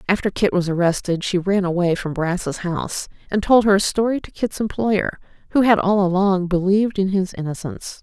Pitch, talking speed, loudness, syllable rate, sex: 190 Hz, 185 wpm, -20 LUFS, 5.2 syllables/s, female